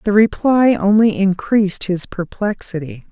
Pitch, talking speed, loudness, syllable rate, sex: 200 Hz, 115 wpm, -16 LUFS, 4.4 syllables/s, female